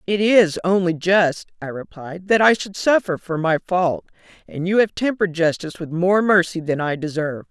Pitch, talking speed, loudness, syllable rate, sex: 180 Hz, 190 wpm, -19 LUFS, 5.1 syllables/s, female